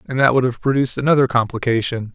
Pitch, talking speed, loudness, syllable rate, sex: 125 Hz, 195 wpm, -18 LUFS, 7.1 syllables/s, male